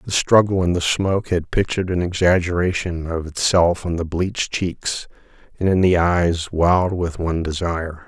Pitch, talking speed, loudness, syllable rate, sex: 90 Hz, 170 wpm, -19 LUFS, 4.9 syllables/s, male